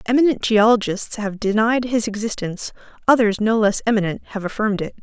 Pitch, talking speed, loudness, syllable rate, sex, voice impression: 215 Hz, 155 wpm, -19 LUFS, 6.0 syllables/s, female, feminine, adult-like, slightly relaxed, soft, slightly muffled, intellectual, calm, friendly, reassuring, elegant, slightly lively, modest